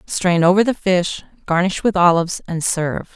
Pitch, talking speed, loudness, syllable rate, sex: 180 Hz, 170 wpm, -17 LUFS, 5.1 syllables/s, female